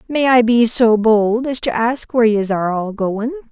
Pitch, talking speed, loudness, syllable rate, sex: 230 Hz, 220 wpm, -15 LUFS, 4.8 syllables/s, female